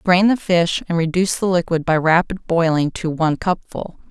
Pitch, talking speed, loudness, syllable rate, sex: 170 Hz, 190 wpm, -18 LUFS, 5.2 syllables/s, female